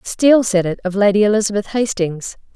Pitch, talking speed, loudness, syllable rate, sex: 205 Hz, 165 wpm, -16 LUFS, 5.8 syllables/s, female